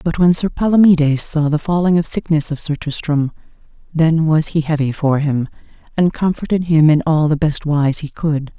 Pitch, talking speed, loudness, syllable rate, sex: 155 Hz, 195 wpm, -16 LUFS, 5.0 syllables/s, female